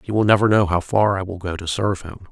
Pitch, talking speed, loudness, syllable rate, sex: 95 Hz, 310 wpm, -19 LUFS, 6.6 syllables/s, male